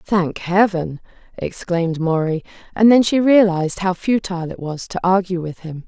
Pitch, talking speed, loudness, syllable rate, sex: 180 Hz, 165 wpm, -18 LUFS, 4.9 syllables/s, female